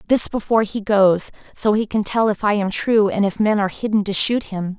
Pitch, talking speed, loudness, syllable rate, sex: 210 Hz, 250 wpm, -18 LUFS, 5.5 syllables/s, female